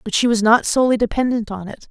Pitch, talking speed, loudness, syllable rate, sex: 230 Hz, 250 wpm, -17 LUFS, 6.7 syllables/s, female